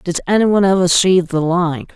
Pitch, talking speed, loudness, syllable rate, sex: 180 Hz, 185 wpm, -14 LUFS, 4.9 syllables/s, male